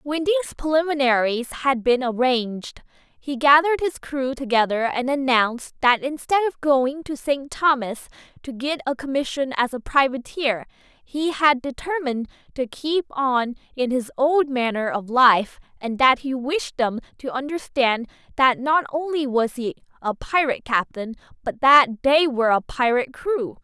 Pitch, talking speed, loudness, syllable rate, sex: 265 Hz, 155 wpm, -21 LUFS, 4.7 syllables/s, female